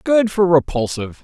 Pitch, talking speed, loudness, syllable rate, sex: 165 Hz, 145 wpm, -17 LUFS, 5.3 syllables/s, male